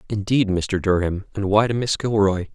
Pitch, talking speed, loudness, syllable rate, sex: 100 Hz, 190 wpm, -21 LUFS, 4.9 syllables/s, male